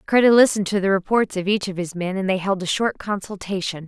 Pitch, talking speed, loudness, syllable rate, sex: 195 Hz, 250 wpm, -20 LUFS, 6.2 syllables/s, female